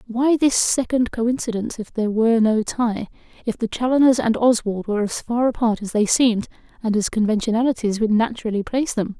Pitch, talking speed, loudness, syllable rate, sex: 225 Hz, 175 wpm, -20 LUFS, 5.9 syllables/s, female